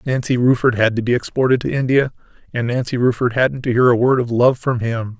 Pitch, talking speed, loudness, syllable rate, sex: 125 Hz, 230 wpm, -17 LUFS, 5.8 syllables/s, male